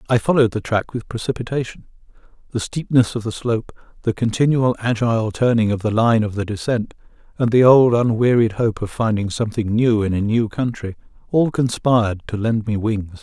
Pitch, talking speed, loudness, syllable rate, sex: 115 Hz, 180 wpm, -19 LUFS, 5.5 syllables/s, male